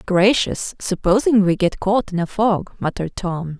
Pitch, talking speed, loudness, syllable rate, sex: 195 Hz, 165 wpm, -19 LUFS, 4.5 syllables/s, female